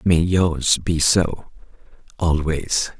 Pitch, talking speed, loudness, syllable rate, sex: 85 Hz, 100 wpm, -19 LUFS, 2.8 syllables/s, male